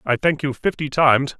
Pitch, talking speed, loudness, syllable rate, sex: 145 Hz, 215 wpm, -19 LUFS, 5.5 syllables/s, male